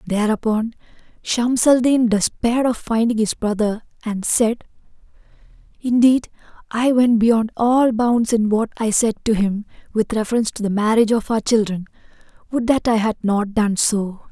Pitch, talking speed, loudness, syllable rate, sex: 225 Hz, 160 wpm, -18 LUFS, 4.7 syllables/s, female